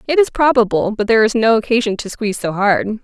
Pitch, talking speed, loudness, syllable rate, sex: 220 Hz, 235 wpm, -15 LUFS, 6.6 syllables/s, female